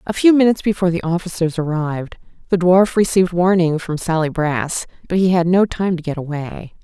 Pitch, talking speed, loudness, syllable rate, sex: 175 Hz, 195 wpm, -17 LUFS, 5.7 syllables/s, female